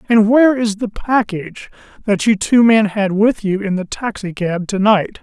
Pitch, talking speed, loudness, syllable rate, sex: 210 Hz, 195 wpm, -15 LUFS, 4.7 syllables/s, male